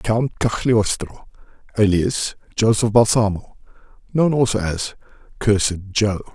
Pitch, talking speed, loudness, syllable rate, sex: 110 Hz, 95 wpm, -19 LUFS, 4.0 syllables/s, male